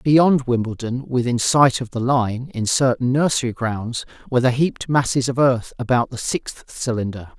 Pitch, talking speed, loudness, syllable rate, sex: 125 Hz, 170 wpm, -20 LUFS, 4.8 syllables/s, male